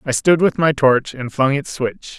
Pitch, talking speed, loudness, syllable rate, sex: 140 Hz, 250 wpm, -17 LUFS, 4.4 syllables/s, male